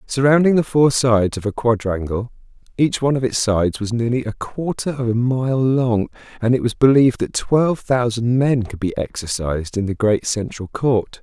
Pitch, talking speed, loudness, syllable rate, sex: 120 Hz, 190 wpm, -18 LUFS, 5.1 syllables/s, male